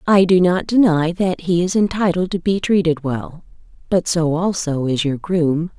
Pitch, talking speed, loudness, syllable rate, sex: 175 Hz, 175 wpm, -18 LUFS, 4.5 syllables/s, female